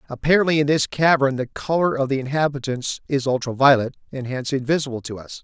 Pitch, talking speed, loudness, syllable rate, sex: 135 Hz, 190 wpm, -20 LUFS, 6.2 syllables/s, male